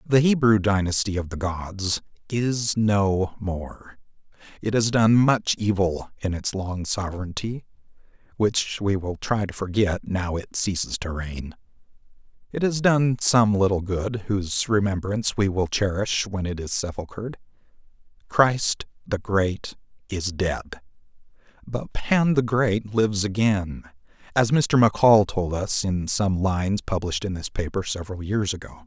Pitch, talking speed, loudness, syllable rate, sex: 100 Hz, 145 wpm, -23 LUFS, 4.1 syllables/s, male